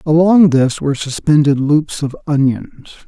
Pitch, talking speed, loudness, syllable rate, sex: 150 Hz, 135 wpm, -14 LUFS, 4.4 syllables/s, male